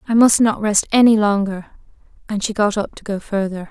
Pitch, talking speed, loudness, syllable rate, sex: 210 Hz, 210 wpm, -17 LUFS, 5.3 syllables/s, female